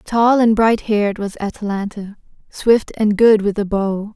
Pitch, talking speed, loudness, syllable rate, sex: 210 Hz, 160 wpm, -16 LUFS, 4.3 syllables/s, female